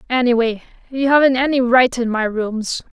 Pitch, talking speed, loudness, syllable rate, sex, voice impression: 245 Hz, 160 wpm, -17 LUFS, 5.0 syllables/s, female, very feminine, young, adult-like, very thin, tensed, slightly weak, bright, hard, slightly muffled, fluent, slightly raspy, very cute, intellectual, very refreshing, slightly sincere, slightly calm, friendly, reassuring, very unique, elegant, wild, very sweet, lively, very strict, slightly intense, sharp, very light